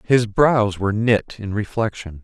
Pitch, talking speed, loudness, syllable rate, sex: 105 Hz, 160 wpm, -20 LUFS, 4.3 syllables/s, male